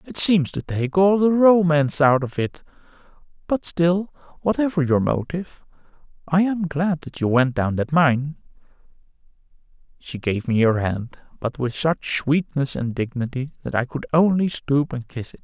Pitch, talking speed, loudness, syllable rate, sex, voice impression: 150 Hz, 165 wpm, -21 LUFS, 4.6 syllables/s, male, masculine, old, slightly tensed, powerful, halting, raspy, mature, friendly, wild, lively, strict, intense, sharp